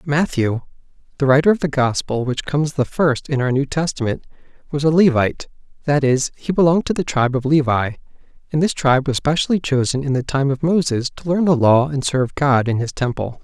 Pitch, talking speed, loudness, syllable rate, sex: 140 Hz, 210 wpm, -18 LUFS, 5.8 syllables/s, male